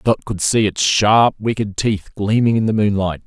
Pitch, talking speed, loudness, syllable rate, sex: 105 Hz, 200 wpm, -17 LUFS, 4.5 syllables/s, male